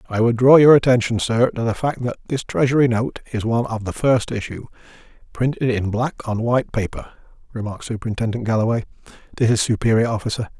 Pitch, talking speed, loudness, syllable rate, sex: 115 Hz, 175 wpm, -19 LUFS, 6.2 syllables/s, male